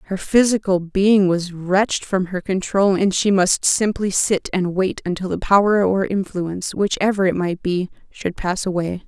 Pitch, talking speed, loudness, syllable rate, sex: 190 Hz, 180 wpm, -19 LUFS, 4.6 syllables/s, female